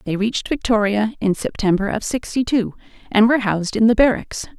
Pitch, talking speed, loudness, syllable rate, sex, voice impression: 220 Hz, 185 wpm, -19 LUFS, 5.8 syllables/s, female, feminine, adult-like, slightly fluent, slightly calm, slightly elegant